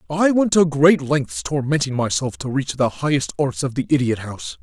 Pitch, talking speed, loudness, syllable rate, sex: 140 Hz, 210 wpm, -19 LUFS, 5.1 syllables/s, male